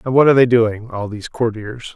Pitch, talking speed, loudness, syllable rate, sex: 115 Hz, 245 wpm, -16 LUFS, 6.0 syllables/s, male